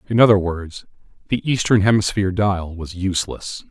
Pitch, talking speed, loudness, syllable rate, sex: 100 Hz, 145 wpm, -19 LUFS, 5.3 syllables/s, male